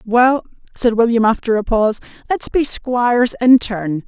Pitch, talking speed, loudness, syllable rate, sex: 235 Hz, 160 wpm, -16 LUFS, 4.6 syllables/s, female